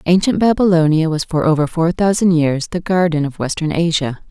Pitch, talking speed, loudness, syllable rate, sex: 165 Hz, 180 wpm, -16 LUFS, 5.4 syllables/s, female